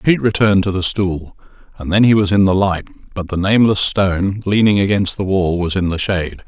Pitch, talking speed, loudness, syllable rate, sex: 95 Hz, 220 wpm, -15 LUFS, 5.9 syllables/s, male